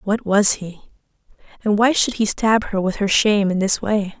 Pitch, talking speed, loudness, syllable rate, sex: 205 Hz, 215 wpm, -18 LUFS, 4.9 syllables/s, female